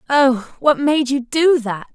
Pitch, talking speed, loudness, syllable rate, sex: 270 Hz, 185 wpm, -17 LUFS, 3.6 syllables/s, female